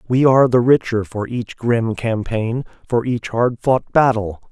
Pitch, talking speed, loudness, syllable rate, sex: 115 Hz, 175 wpm, -18 LUFS, 4.3 syllables/s, male